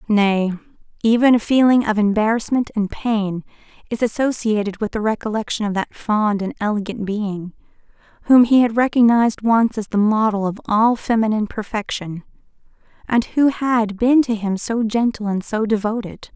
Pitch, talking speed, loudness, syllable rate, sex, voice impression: 220 Hz, 155 wpm, -18 LUFS, 5.0 syllables/s, female, feminine, adult-like, relaxed, bright, soft, clear, fluent, intellectual, calm, friendly, reassuring, elegant, kind, modest